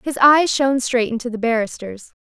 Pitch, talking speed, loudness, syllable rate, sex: 245 Hz, 190 wpm, -17 LUFS, 5.4 syllables/s, female